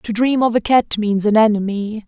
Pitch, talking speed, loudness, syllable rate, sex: 220 Hz, 230 wpm, -16 LUFS, 4.9 syllables/s, female